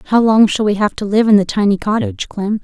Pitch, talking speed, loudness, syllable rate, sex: 210 Hz, 275 wpm, -14 LUFS, 5.8 syllables/s, female